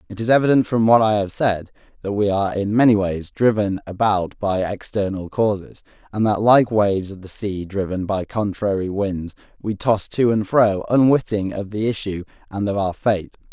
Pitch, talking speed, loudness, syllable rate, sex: 105 Hz, 190 wpm, -20 LUFS, 4.9 syllables/s, male